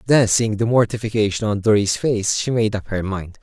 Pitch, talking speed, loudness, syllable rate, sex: 105 Hz, 210 wpm, -19 LUFS, 5.3 syllables/s, male